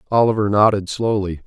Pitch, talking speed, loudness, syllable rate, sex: 105 Hz, 125 wpm, -18 LUFS, 5.8 syllables/s, male